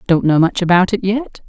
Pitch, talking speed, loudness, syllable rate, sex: 190 Hz, 245 wpm, -15 LUFS, 5.3 syllables/s, female